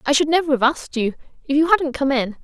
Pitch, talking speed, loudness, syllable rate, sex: 285 Hz, 270 wpm, -19 LUFS, 6.5 syllables/s, female